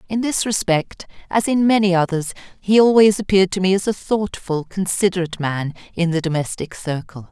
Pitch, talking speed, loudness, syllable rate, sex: 185 Hz, 170 wpm, -19 LUFS, 5.4 syllables/s, female